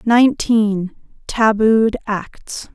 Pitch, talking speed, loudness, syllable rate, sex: 215 Hz, 65 wpm, -16 LUFS, 2.8 syllables/s, female